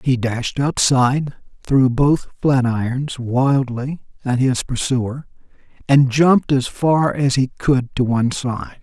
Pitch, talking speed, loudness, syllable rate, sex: 130 Hz, 145 wpm, -18 LUFS, 3.8 syllables/s, male